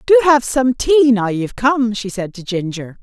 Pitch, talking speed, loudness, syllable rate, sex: 235 Hz, 220 wpm, -16 LUFS, 4.5 syllables/s, female